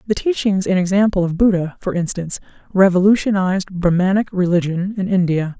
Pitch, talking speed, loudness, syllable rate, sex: 190 Hz, 140 wpm, -17 LUFS, 5.8 syllables/s, female